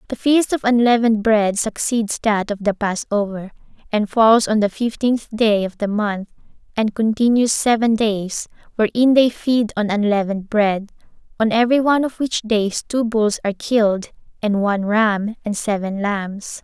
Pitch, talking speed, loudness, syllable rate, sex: 215 Hz, 160 wpm, -18 LUFS, 4.7 syllables/s, female